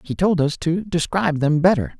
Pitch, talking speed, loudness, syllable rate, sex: 160 Hz, 210 wpm, -19 LUFS, 5.4 syllables/s, male